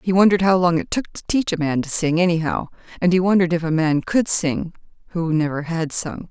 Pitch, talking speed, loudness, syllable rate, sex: 170 Hz, 230 wpm, -20 LUFS, 5.9 syllables/s, female